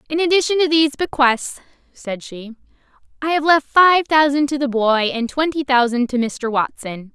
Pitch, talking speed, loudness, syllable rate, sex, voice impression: 275 Hz, 175 wpm, -17 LUFS, 4.8 syllables/s, female, slightly gender-neutral, slightly young, bright, soft, fluent, friendly, lively, kind, light